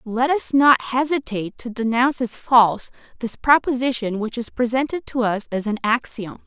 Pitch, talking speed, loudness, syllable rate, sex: 240 Hz, 165 wpm, -20 LUFS, 5.0 syllables/s, female